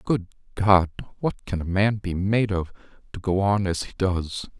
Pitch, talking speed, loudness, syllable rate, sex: 95 Hz, 195 wpm, -24 LUFS, 4.4 syllables/s, male